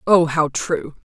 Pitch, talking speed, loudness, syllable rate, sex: 160 Hz, 160 wpm, -19 LUFS, 3.5 syllables/s, female